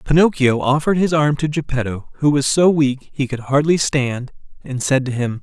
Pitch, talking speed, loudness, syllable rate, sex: 140 Hz, 200 wpm, -17 LUFS, 5.1 syllables/s, male